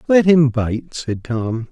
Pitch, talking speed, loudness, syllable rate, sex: 135 Hz, 175 wpm, -17 LUFS, 3.2 syllables/s, male